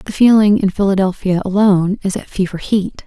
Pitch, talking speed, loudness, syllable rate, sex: 195 Hz, 175 wpm, -15 LUFS, 5.6 syllables/s, female